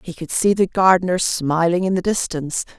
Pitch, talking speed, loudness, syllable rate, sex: 180 Hz, 195 wpm, -18 LUFS, 5.4 syllables/s, female